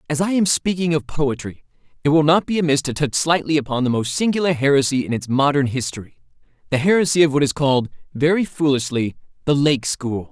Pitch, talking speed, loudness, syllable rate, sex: 145 Hz, 200 wpm, -19 LUFS, 6.0 syllables/s, male